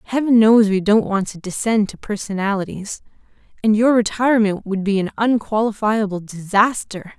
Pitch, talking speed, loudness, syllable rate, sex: 210 Hz, 140 wpm, -18 LUFS, 5.1 syllables/s, female